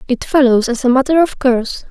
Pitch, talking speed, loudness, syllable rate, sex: 255 Hz, 220 wpm, -14 LUFS, 5.9 syllables/s, female